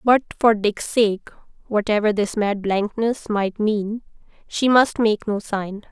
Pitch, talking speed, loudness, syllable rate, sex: 215 Hz, 130 wpm, -20 LUFS, 3.8 syllables/s, female